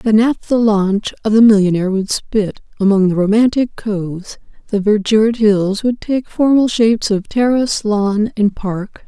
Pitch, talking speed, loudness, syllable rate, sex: 215 Hz, 160 wpm, -15 LUFS, 4.6 syllables/s, female